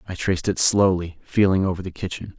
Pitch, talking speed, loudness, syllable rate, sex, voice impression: 95 Hz, 200 wpm, -21 LUFS, 6.1 syllables/s, male, masculine, adult-like, tensed, powerful, clear, fluent, cool, intellectual, calm, slightly mature, slightly friendly, reassuring, wild, lively